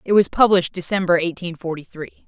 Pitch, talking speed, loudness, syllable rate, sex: 175 Hz, 185 wpm, -19 LUFS, 6.0 syllables/s, female